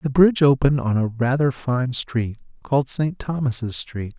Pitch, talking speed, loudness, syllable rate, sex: 130 Hz, 170 wpm, -21 LUFS, 4.6 syllables/s, male